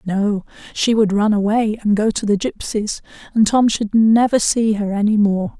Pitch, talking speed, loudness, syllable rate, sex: 215 Hz, 195 wpm, -17 LUFS, 4.6 syllables/s, female